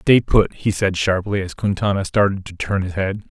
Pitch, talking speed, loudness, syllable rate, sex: 95 Hz, 210 wpm, -19 LUFS, 4.9 syllables/s, male